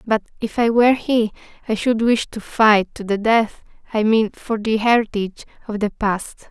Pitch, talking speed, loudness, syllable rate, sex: 220 Hz, 195 wpm, -19 LUFS, 4.7 syllables/s, female